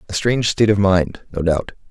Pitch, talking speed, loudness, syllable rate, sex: 100 Hz, 220 wpm, -18 LUFS, 5.8 syllables/s, male